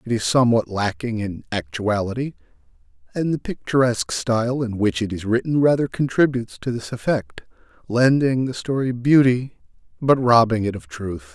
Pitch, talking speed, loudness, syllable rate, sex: 115 Hz, 155 wpm, -21 LUFS, 5.1 syllables/s, male